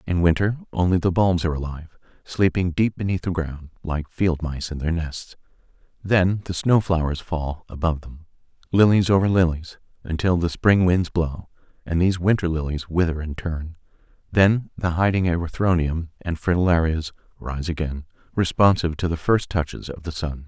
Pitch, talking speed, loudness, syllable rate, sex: 85 Hz, 165 wpm, -22 LUFS, 5.2 syllables/s, male